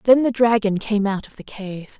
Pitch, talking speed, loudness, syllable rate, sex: 215 Hz, 240 wpm, -20 LUFS, 5.1 syllables/s, female